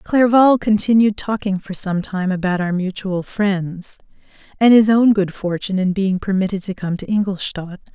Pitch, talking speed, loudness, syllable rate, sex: 195 Hz, 165 wpm, -17 LUFS, 4.7 syllables/s, female